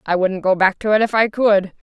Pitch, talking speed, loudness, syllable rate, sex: 200 Hz, 280 wpm, -17 LUFS, 5.5 syllables/s, female